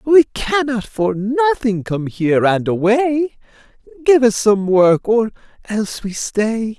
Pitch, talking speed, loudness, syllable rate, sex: 225 Hz, 140 wpm, -16 LUFS, 3.7 syllables/s, male